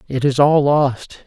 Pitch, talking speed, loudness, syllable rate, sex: 140 Hz, 190 wpm, -15 LUFS, 3.6 syllables/s, male